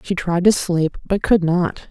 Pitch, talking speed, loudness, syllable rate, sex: 180 Hz, 220 wpm, -18 LUFS, 4.0 syllables/s, female